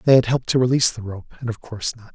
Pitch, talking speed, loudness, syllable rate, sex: 120 Hz, 310 wpm, -21 LUFS, 7.4 syllables/s, male